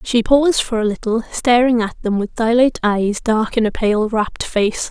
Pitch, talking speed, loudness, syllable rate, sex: 225 Hz, 210 wpm, -17 LUFS, 4.7 syllables/s, female